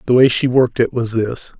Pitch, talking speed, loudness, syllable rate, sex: 120 Hz, 265 wpm, -16 LUFS, 5.7 syllables/s, male